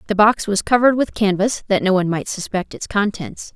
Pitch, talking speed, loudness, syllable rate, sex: 200 Hz, 220 wpm, -18 LUFS, 5.7 syllables/s, female